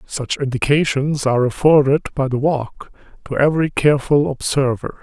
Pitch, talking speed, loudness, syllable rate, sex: 140 Hz, 130 wpm, -17 LUFS, 5.2 syllables/s, male